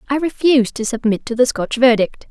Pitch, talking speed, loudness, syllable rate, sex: 245 Hz, 210 wpm, -16 LUFS, 5.7 syllables/s, female